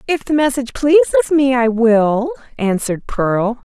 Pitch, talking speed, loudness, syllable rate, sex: 250 Hz, 145 wpm, -15 LUFS, 4.5 syllables/s, female